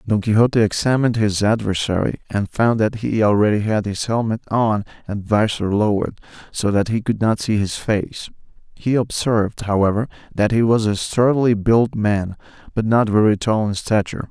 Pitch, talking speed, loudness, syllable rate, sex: 110 Hz, 170 wpm, -19 LUFS, 5.2 syllables/s, male